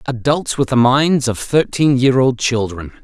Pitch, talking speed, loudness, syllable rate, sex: 130 Hz, 180 wpm, -15 LUFS, 4.2 syllables/s, male